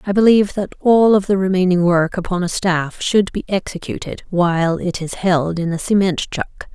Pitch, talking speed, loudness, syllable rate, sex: 185 Hz, 195 wpm, -17 LUFS, 5.2 syllables/s, female